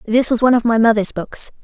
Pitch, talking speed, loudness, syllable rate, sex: 230 Hz, 255 wpm, -15 LUFS, 6.3 syllables/s, female